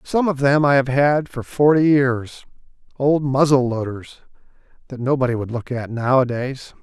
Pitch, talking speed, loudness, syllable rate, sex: 135 Hz, 160 wpm, -19 LUFS, 4.6 syllables/s, male